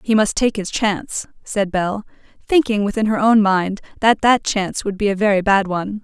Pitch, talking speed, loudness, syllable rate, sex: 205 Hz, 210 wpm, -18 LUFS, 5.1 syllables/s, female